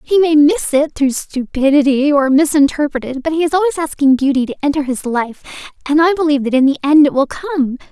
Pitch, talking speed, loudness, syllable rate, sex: 290 Hz, 220 wpm, -14 LUFS, 5.8 syllables/s, female